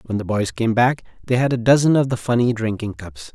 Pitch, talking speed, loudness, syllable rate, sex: 115 Hz, 250 wpm, -19 LUFS, 5.8 syllables/s, male